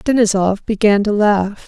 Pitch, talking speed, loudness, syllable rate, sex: 205 Hz, 145 wpm, -15 LUFS, 4.5 syllables/s, female